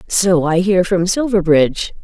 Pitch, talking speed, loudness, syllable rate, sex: 185 Hz, 150 wpm, -15 LUFS, 4.4 syllables/s, female